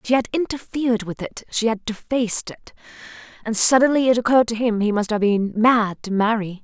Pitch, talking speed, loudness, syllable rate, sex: 225 Hz, 200 wpm, -20 LUFS, 5.6 syllables/s, female